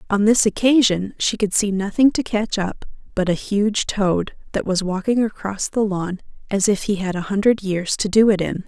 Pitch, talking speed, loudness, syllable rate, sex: 205 Hz, 215 wpm, -20 LUFS, 4.8 syllables/s, female